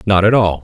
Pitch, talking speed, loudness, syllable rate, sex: 100 Hz, 285 wpm, -13 LUFS, 6.1 syllables/s, male